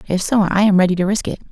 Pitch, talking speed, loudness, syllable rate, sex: 195 Hz, 320 wpm, -16 LUFS, 7.3 syllables/s, female